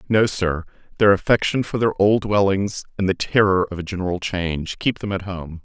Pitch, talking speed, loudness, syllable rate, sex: 95 Hz, 200 wpm, -20 LUFS, 5.3 syllables/s, male